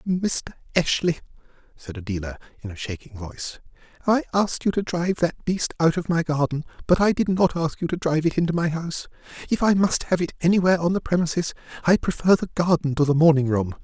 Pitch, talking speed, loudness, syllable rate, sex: 160 Hz, 210 wpm, -23 LUFS, 6.1 syllables/s, male